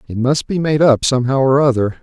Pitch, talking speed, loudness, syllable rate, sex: 130 Hz, 235 wpm, -15 LUFS, 5.9 syllables/s, male